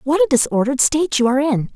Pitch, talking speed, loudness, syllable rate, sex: 270 Hz, 240 wpm, -16 LUFS, 7.4 syllables/s, female